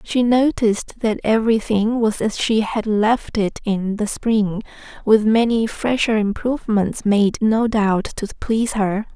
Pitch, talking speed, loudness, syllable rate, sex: 220 Hz, 150 wpm, -19 LUFS, 4.1 syllables/s, female